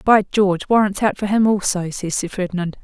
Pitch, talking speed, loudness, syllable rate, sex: 195 Hz, 210 wpm, -18 LUFS, 5.5 syllables/s, female